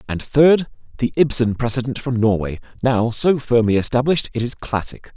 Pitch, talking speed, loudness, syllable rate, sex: 125 Hz, 165 wpm, -18 LUFS, 5.3 syllables/s, male